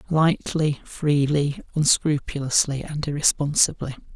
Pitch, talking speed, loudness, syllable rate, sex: 145 Hz, 70 wpm, -22 LUFS, 4.1 syllables/s, male